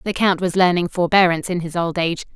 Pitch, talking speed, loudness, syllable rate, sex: 175 Hz, 230 wpm, -18 LUFS, 6.5 syllables/s, female